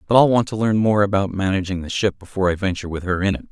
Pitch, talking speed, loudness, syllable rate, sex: 100 Hz, 290 wpm, -20 LUFS, 7.2 syllables/s, male